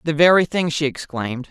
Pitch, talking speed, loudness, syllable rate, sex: 150 Hz, 200 wpm, -19 LUFS, 5.8 syllables/s, female